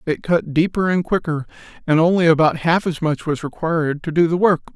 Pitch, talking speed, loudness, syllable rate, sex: 165 Hz, 215 wpm, -18 LUFS, 5.5 syllables/s, male